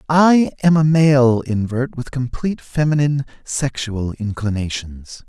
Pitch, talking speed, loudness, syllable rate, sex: 130 Hz, 115 wpm, -18 LUFS, 4.2 syllables/s, male